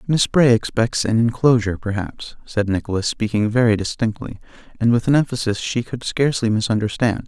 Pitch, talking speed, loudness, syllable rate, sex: 115 Hz, 155 wpm, -19 LUFS, 5.6 syllables/s, male